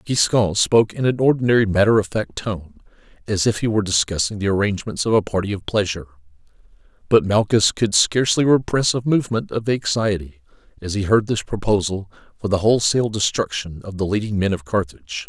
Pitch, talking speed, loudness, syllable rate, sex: 100 Hz, 175 wpm, -19 LUFS, 6.1 syllables/s, male